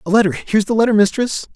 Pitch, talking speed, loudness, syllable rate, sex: 210 Hz, 230 wpm, -16 LUFS, 7.3 syllables/s, male